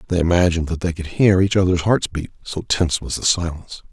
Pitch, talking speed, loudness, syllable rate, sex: 85 Hz, 230 wpm, -19 LUFS, 6.3 syllables/s, male